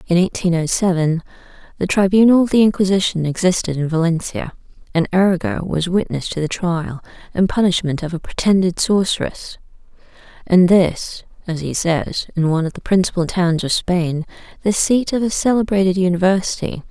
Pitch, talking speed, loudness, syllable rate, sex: 180 Hz, 155 wpm, -17 LUFS, 5.4 syllables/s, female